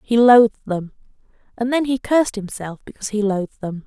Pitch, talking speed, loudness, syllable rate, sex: 220 Hz, 185 wpm, -19 LUFS, 6.0 syllables/s, female